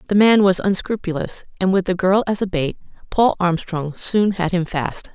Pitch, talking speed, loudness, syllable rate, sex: 185 Hz, 200 wpm, -19 LUFS, 4.8 syllables/s, female